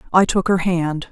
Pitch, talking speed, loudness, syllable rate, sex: 175 Hz, 215 wpm, -18 LUFS, 4.8 syllables/s, female